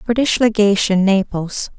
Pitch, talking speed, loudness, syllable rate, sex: 205 Hz, 100 wpm, -16 LUFS, 4.3 syllables/s, female